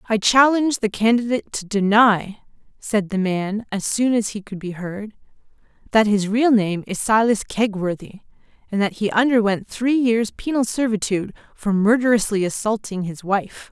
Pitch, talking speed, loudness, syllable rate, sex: 215 Hz, 155 wpm, -20 LUFS, 4.9 syllables/s, female